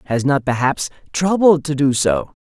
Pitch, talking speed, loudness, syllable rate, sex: 140 Hz, 170 wpm, -17 LUFS, 4.7 syllables/s, male